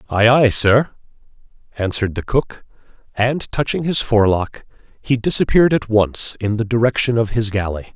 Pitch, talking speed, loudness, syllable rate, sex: 115 Hz, 150 wpm, -17 LUFS, 5.2 syllables/s, male